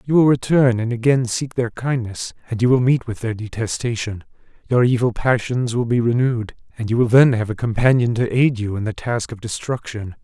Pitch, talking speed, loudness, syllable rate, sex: 120 Hz, 210 wpm, -19 LUFS, 5.4 syllables/s, male